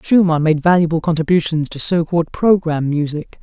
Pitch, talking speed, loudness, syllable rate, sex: 165 Hz, 140 wpm, -16 LUFS, 5.4 syllables/s, female